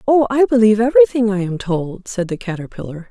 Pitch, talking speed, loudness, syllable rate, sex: 215 Hz, 195 wpm, -16 LUFS, 6.1 syllables/s, female